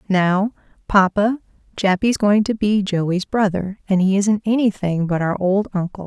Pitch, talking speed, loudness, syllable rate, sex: 195 Hz, 150 wpm, -19 LUFS, 4.4 syllables/s, female